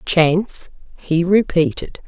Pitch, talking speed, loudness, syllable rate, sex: 170 Hz, 85 wpm, -17 LUFS, 3.6 syllables/s, female